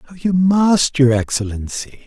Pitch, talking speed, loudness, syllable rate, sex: 145 Hz, 115 wpm, -16 LUFS, 4.2 syllables/s, male